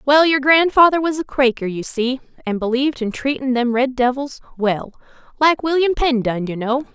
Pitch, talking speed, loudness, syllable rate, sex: 265 Hz, 180 wpm, -18 LUFS, 5.1 syllables/s, female